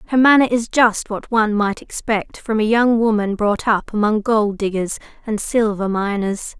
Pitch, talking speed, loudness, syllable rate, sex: 215 Hz, 180 wpm, -18 LUFS, 4.5 syllables/s, female